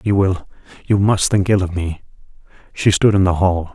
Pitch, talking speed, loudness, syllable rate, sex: 95 Hz, 190 wpm, -17 LUFS, 5.0 syllables/s, male